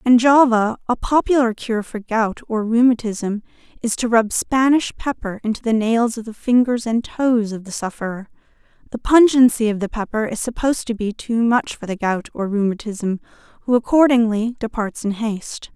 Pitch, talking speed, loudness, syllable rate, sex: 225 Hz, 175 wpm, -19 LUFS, 5.0 syllables/s, female